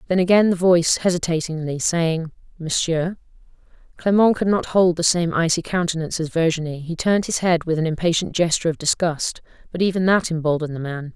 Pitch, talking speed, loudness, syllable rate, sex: 170 Hz, 180 wpm, -20 LUFS, 5.9 syllables/s, female